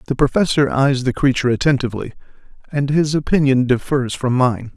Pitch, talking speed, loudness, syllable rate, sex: 135 Hz, 150 wpm, -17 LUFS, 5.7 syllables/s, male